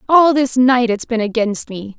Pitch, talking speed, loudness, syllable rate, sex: 240 Hz, 210 wpm, -15 LUFS, 4.4 syllables/s, female